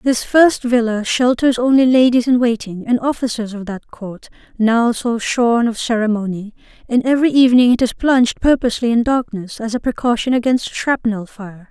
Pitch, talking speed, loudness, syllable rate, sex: 235 Hz, 170 wpm, -16 LUFS, 5.1 syllables/s, female